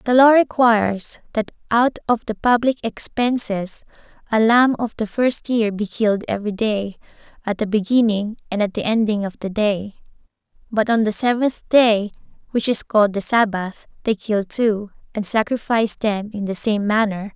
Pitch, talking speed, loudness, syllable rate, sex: 220 Hz, 170 wpm, -19 LUFS, 4.7 syllables/s, female